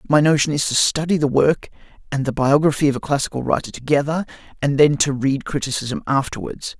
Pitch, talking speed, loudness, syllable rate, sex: 140 Hz, 185 wpm, -19 LUFS, 5.9 syllables/s, male